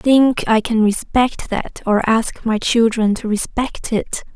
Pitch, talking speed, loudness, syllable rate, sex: 225 Hz, 165 wpm, -17 LUFS, 3.6 syllables/s, female